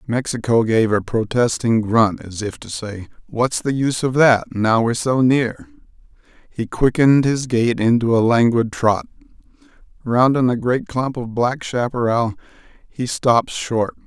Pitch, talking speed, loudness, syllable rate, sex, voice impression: 120 Hz, 155 wpm, -18 LUFS, 4.4 syllables/s, male, masculine, middle-aged, slightly powerful, soft, slightly muffled, intellectual, mature, wild, slightly strict, modest